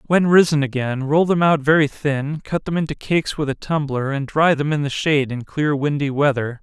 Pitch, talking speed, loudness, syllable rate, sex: 145 Hz, 225 wpm, -19 LUFS, 5.3 syllables/s, male